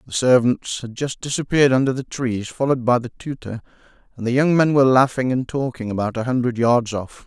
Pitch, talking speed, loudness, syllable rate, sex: 125 Hz, 205 wpm, -20 LUFS, 5.8 syllables/s, male